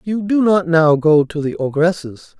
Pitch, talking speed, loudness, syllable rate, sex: 170 Hz, 200 wpm, -15 LUFS, 4.0 syllables/s, male